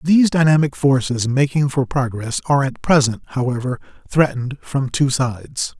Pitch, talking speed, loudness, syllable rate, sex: 135 Hz, 145 wpm, -18 LUFS, 5.2 syllables/s, male